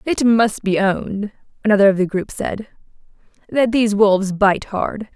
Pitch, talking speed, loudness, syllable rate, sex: 210 Hz, 165 wpm, -17 LUFS, 4.9 syllables/s, female